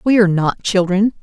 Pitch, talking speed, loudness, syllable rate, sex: 195 Hz, 195 wpm, -15 LUFS, 5.7 syllables/s, female